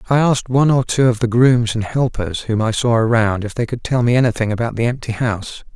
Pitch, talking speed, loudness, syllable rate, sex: 120 Hz, 250 wpm, -17 LUFS, 6.1 syllables/s, male